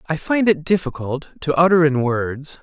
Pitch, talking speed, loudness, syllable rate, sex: 155 Hz, 185 wpm, -19 LUFS, 4.6 syllables/s, male